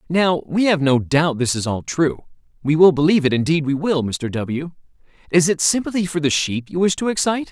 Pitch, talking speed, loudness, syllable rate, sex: 160 Hz, 225 wpm, -18 LUFS, 5.5 syllables/s, male